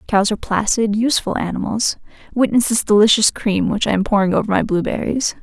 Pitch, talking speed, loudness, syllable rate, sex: 215 Hz, 165 wpm, -17 LUFS, 5.9 syllables/s, female